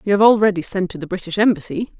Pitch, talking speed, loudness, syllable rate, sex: 195 Hz, 240 wpm, -18 LUFS, 7.0 syllables/s, female